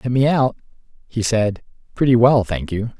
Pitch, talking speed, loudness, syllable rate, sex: 115 Hz, 180 wpm, -18 LUFS, 4.9 syllables/s, male